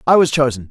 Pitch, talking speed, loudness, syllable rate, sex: 140 Hz, 255 wpm, -15 LUFS, 7.0 syllables/s, male